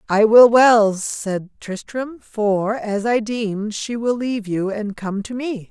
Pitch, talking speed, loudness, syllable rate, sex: 220 Hz, 180 wpm, -18 LUFS, 3.5 syllables/s, female